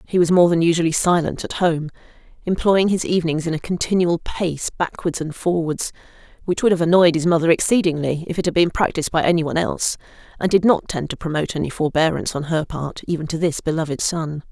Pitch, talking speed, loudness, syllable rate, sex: 165 Hz, 205 wpm, -20 LUFS, 6.2 syllables/s, female